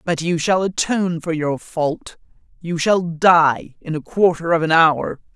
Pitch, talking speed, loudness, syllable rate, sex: 165 Hz, 180 wpm, -18 LUFS, 4.1 syllables/s, female